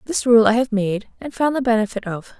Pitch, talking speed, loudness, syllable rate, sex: 230 Hz, 250 wpm, -18 LUFS, 5.7 syllables/s, female